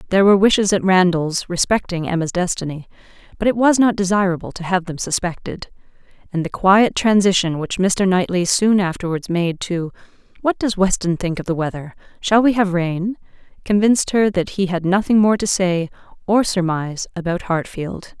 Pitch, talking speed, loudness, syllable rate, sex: 185 Hz, 170 wpm, -18 LUFS, 5.3 syllables/s, female